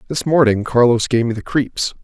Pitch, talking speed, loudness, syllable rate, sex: 125 Hz, 205 wpm, -16 LUFS, 5.1 syllables/s, male